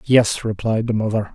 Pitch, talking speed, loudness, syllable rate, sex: 110 Hz, 180 wpm, -20 LUFS, 4.8 syllables/s, male